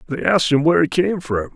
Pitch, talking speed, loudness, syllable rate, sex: 145 Hz, 270 wpm, -18 LUFS, 6.7 syllables/s, male